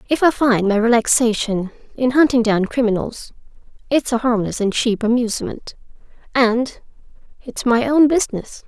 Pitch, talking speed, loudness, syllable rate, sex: 240 Hz, 130 wpm, -18 LUFS, 5.0 syllables/s, female